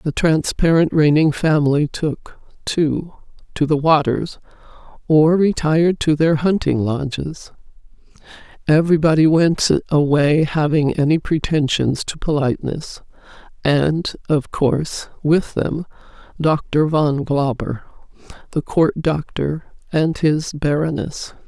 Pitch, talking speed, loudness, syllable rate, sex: 150 Hz, 105 wpm, -18 LUFS, 3.9 syllables/s, female